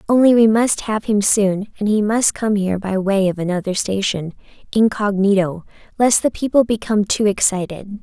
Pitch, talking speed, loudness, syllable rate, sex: 205 Hz, 170 wpm, -17 LUFS, 5.1 syllables/s, female